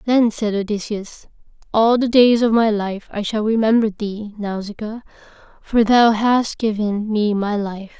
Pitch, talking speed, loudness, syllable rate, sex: 215 Hz, 160 wpm, -18 LUFS, 4.2 syllables/s, female